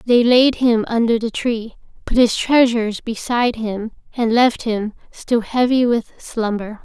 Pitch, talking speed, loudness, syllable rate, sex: 230 Hz, 160 wpm, -17 LUFS, 4.2 syllables/s, female